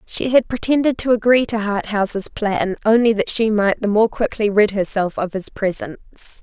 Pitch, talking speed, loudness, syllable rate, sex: 215 Hz, 185 wpm, -18 LUFS, 4.8 syllables/s, female